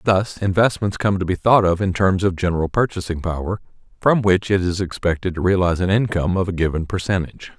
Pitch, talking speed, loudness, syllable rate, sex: 95 Hz, 205 wpm, -19 LUFS, 6.1 syllables/s, male